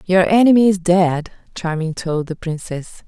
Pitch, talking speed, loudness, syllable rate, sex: 175 Hz, 155 wpm, -17 LUFS, 4.7 syllables/s, female